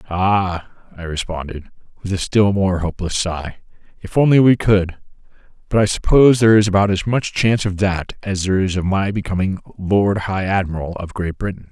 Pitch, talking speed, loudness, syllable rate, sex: 95 Hz, 185 wpm, -18 LUFS, 5.4 syllables/s, male